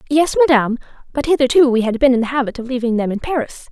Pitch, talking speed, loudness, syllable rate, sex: 260 Hz, 240 wpm, -16 LUFS, 7.2 syllables/s, female